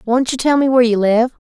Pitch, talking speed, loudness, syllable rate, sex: 245 Hz, 280 wpm, -14 LUFS, 6.3 syllables/s, female